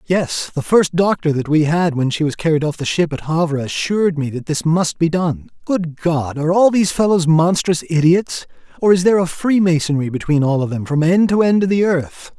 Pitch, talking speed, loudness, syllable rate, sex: 165 Hz, 230 wpm, -16 LUFS, 5.3 syllables/s, male